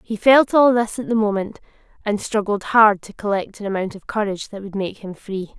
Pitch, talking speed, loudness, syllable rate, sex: 210 Hz, 225 wpm, -19 LUFS, 5.4 syllables/s, female